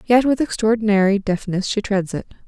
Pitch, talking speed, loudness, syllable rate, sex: 210 Hz, 170 wpm, -19 LUFS, 5.5 syllables/s, female